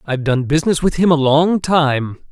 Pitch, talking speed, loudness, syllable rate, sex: 150 Hz, 210 wpm, -15 LUFS, 5.3 syllables/s, male